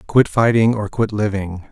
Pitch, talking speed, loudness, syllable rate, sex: 105 Hz, 175 wpm, -17 LUFS, 4.5 syllables/s, male